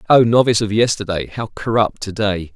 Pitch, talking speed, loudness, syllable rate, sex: 105 Hz, 190 wpm, -17 LUFS, 5.7 syllables/s, male